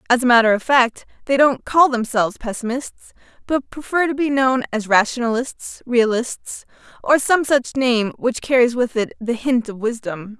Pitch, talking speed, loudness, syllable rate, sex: 245 Hz, 175 wpm, -18 LUFS, 4.8 syllables/s, female